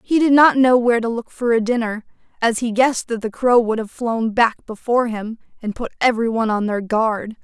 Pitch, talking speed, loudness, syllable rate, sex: 230 Hz, 235 wpm, -18 LUFS, 5.6 syllables/s, female